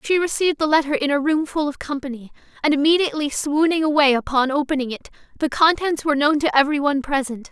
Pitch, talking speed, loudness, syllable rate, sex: 290 Hz, 200 wpm, -19 LUFS, 6.6 syllables/s, female